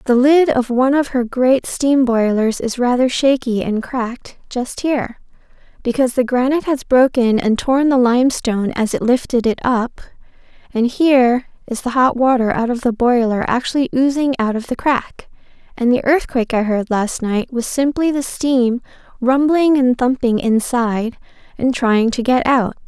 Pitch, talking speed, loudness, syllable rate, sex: 250 Hz, 175 wpm, -16 LUFS, 4.8 syllables/s, female